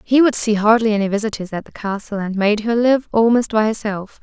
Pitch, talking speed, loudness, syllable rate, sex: 215 Hz, 225 wpm, -17 LUFS, 5.6 syllables/s, female